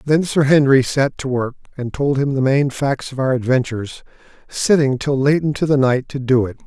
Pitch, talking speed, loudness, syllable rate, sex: 135 Hz, 215 wpm, -17 LUFS, 5.1 syllables/s, male